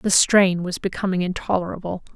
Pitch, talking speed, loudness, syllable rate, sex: 185 Hz, 140 wpm, -21 LUFS, 5.4 syllables/s, female